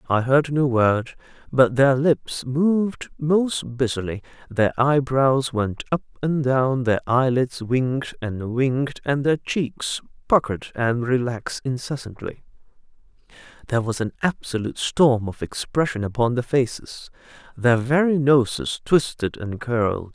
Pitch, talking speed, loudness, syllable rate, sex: 130 Hz, 130 wpm, -22 LUFS, 4.2 syllables/s, male